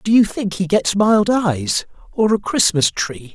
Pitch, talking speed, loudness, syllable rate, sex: 190 Hz, 195 wpm, -17 LUFS, 3.9 syllables/s, male